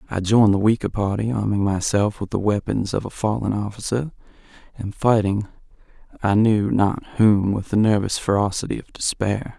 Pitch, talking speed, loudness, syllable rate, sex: 105 Hz, 165 wpm, -21 LUFS, 5.1 syllables/s, male